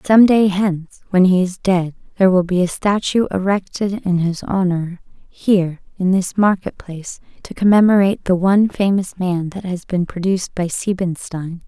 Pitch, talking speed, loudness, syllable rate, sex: 185 Hz, 170 wpm, -17 LUFS, 5.0 syllables/s, female